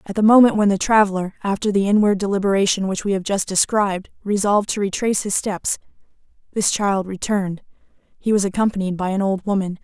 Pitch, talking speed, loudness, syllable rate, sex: 200 Hz, 185 wpm, -19 LUFS, 6.2 syllables/s, female